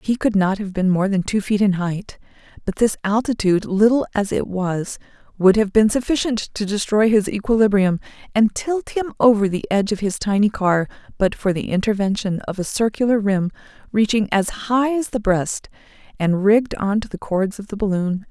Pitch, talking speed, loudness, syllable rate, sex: 205 Hz, 195 wpm, -19 LUFS, 5.2 syllables/s, female